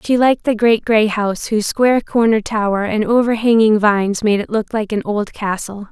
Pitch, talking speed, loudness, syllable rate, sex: 215 Hz, 215 wpm, -16 LUFS, 5.4 syllables/s, female